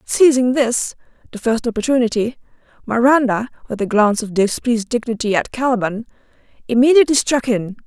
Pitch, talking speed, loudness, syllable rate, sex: 235 Hz, 130 wpm, -17 LUFS, 5.8 syllables/s, female